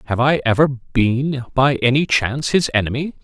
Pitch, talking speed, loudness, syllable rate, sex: 130 Hz, 165 wpm, -17 LUFS, 5.0 syllables/s, male